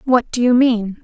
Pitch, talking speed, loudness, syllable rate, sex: 240 Hz, 230 wpm, -15 LUFS, 4.4 syllables/s, female